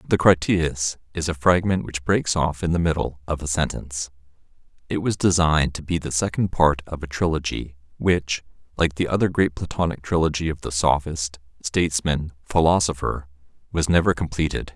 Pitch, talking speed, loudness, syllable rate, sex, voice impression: 80 Hz, 165 wpm, -22 LUFS, 5.3 syllables/s, male, masculine, adult-like, thick, tensed, powerful, slightly dark, slightly raspy, cool, intellectual, mature, wild, kind, slightly modest